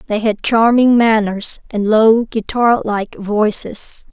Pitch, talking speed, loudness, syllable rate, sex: 220 Hz, 130 wpm, -15 LUFS, 3.4 syllables/s, female